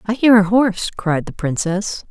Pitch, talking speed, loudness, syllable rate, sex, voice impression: 205 Hz, 200 wpm, -17 LUFS, 4.7 syllables/s, female, very feminine, very adult-like, elegant, slightly sweet